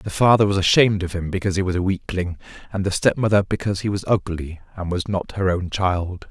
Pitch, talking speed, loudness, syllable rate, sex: 95 Hz, 230 wpm, -21 LUFS, 6.0 syllables/s, male